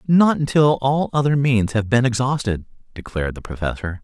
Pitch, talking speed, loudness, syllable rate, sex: 125 Hz, 165 wpm, -19 LUFS, 5.3 syllables/s, male